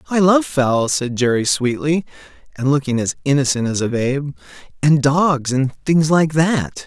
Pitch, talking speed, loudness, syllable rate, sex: 140 Hz, 165 wpm, -17 LUFS, 4.3 syllables/s, male